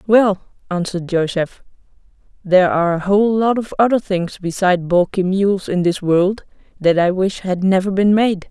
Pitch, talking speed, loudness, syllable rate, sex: 190 Hz, 170 wpm, -17 LUFS, 5.1 syllables/s, female